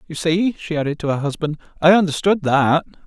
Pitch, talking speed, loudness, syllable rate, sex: 160 Hz, 195 wpm, -18 LUFS, 5.8 syllables/s, male